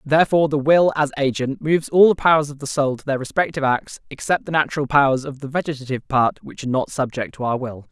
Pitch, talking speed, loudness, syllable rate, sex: 140 Hz, 235 wpm, -19 LUFS, 6.6 syllables/s, male